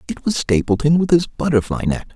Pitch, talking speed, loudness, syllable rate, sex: 140 Hz, 195 wpm, -18 LUFS, 5.8 syllables/s, male